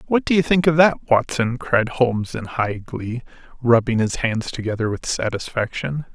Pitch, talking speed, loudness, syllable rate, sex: 125 Hz, 175 wpm, -20 LUFS, 4.7 syllables/s, male